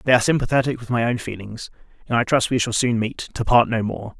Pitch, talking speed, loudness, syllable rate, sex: 120 Hz, 255 wpm, -21 LUFS, 6.4 syllables/s, male